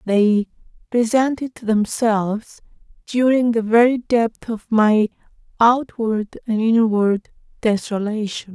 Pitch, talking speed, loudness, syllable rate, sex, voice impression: 225 Hz, 90 wpm, -19 LUFS, 3.6 syllables/s, female, feminine, adult-like, slightly soft, halting, calm, slightly elegant, kind